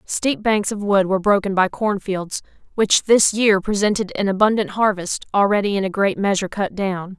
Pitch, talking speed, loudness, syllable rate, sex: 200 Hz, 190 wpm, -19 LUFS, 5.1 syllables/s, female